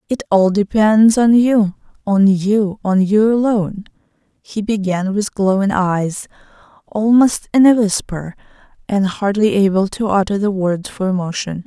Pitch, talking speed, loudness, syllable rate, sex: 205 Hz, 145 wpm, -15 LUFS, 4.3 syllables/s, female